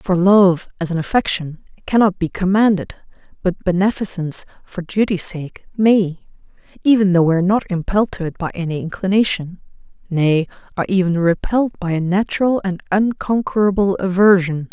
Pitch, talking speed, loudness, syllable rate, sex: 185 Hz, 145 wpm, -17 LUFS, 5.3 syllables/s, female